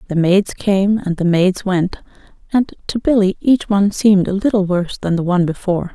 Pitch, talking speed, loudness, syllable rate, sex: 190 Hz, 200 wpm, -16 LUFS, 5.5 syllables/s, female